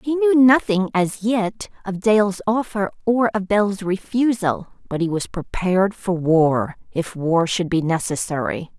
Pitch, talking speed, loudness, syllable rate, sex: 195 Hz, 155 wpm, -20 LUFS, 4.2 syllables/s, female